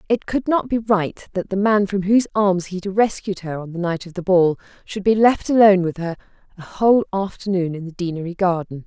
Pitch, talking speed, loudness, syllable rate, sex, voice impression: 190 Hz, 230 wpm, -19 LUFS, 5.6 syllables/s, female, very feminine, very adult-like, slightly intellectual, elegant